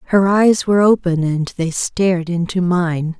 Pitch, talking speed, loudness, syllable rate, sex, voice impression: 175 Hz, 170 wpm, -16 LUFS, 4.5 syllables/s, female, feminine, middle-aged, tensed, slightly powerful, soft, slightly muffled, intellectual, calm, slightly friendly, reassuring, elegant, slightly lively, slightly kind